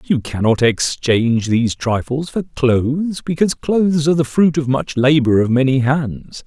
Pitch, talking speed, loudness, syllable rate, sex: 135 Hz, 165 wpm, -16 LUFS, 4.7 syllables/s, male